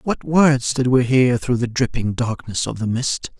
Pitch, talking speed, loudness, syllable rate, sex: 125 Hz, 210 wpm, -19 LUFS, 4.3 syllables/s, male